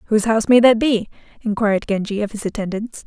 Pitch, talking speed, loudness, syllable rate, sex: 215 Hz, 195 wpm, -18 LUFS, 6.8 syllables/s, female